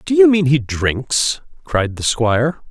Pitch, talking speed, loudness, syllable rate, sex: 130 Hz, 180 wpm, -16 LUFS, 3.9 syllables/s, male